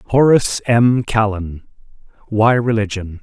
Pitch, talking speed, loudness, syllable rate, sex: 110 Hz, 95 wpm, -16 LUFS, 4.4 syllables/s, male